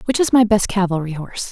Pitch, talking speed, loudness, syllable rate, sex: 200 Hz, 240 wpm, -17 LUFS, 6.5 syllables/s, female